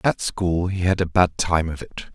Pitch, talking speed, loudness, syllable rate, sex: 90 Hz, 250 wpm, -21 LUFS, 5.0 syllables/s, male